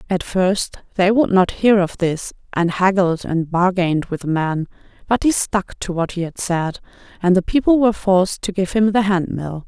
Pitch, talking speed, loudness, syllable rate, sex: 185 Hz, 210 wpm, -18 LUFS, 4.8 syllables/s, female